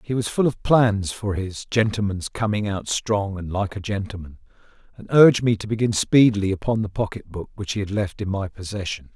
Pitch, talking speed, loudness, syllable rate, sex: 105 Hz, 210 wpm, -22 LUFS, 5.4 syllables/s, male